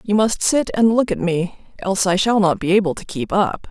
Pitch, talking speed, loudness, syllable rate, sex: 195 Hz, 260 wpm, -18 LUFS, 5.1 syllables/s, female